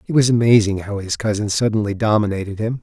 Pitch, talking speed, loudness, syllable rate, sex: 110 Hz, 190 wpm, -18 LUFS, 6.3 syllables/s, male